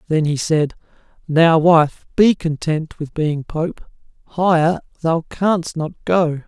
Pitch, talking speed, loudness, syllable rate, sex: 160 Hz, 140 wpm, -18 LUFS, 3.5 syllables/s, male